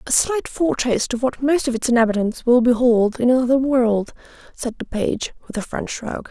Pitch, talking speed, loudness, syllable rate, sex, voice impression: 245 Hz, 200 wpm, -19 LUFS, 5.3 syllables/s, female, very feminine, slightly young, slightly adult-like, thin, very tensed, very powerful, bright, very hard, very clear, very fluent, slightly raspy, cute, intellectual, very refreshing, sincere, slightly calm, slightly friendly, slightly reassuring, very unique, slightly elegant, very wild, slightly sweet, very lively, very strict, very intense, very sharp